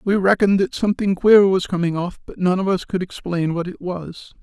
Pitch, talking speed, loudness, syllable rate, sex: 180 Hz, 230 wpm, -19 LUFS, 5.5 syllables/s, male